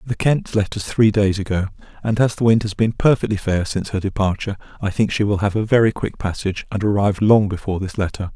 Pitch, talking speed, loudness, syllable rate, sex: 105 Hz, 235 wpm, -19 LUFS, 6.3 syllables/s, male